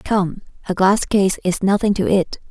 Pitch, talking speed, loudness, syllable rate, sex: 195 Hz, 190 wpm, -18 LUFS, 4.4 syllables/s, female